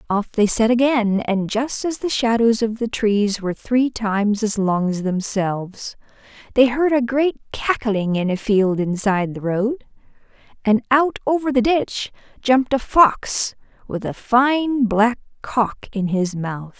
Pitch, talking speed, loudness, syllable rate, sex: 225 Hz, 165 wpm, -19 LUFS, 4.1 syllables/s, female